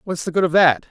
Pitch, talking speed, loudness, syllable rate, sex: 165 Hz, 400 wpm, -17 LUFS, 7.7 syllables/s, male